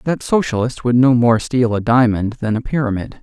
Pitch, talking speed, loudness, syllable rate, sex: 120 Hz, 205 wpm, -16 LUFS, 5.0 syllables/s, male